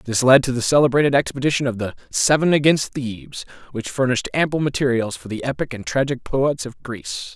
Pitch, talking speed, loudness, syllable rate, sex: 130 Hz, 190 wpm, -20 LUFS, 5.8 syllables/s, male